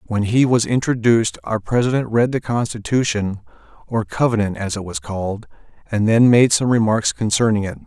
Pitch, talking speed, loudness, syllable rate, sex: 115 Hz, 170 wpm, -18 LUFS, 5.4 syllables/s, male